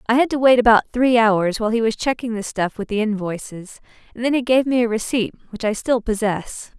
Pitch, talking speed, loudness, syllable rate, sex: 225 Hz, 240 wpm, -19 LUFS, 5.7 syllables/s, female